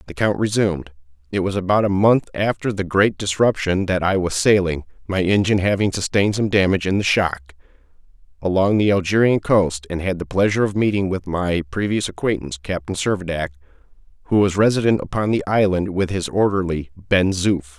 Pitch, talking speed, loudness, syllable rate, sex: 95 Hz, 170 wpm, -19 LUFS, 5.7 syllables/s, male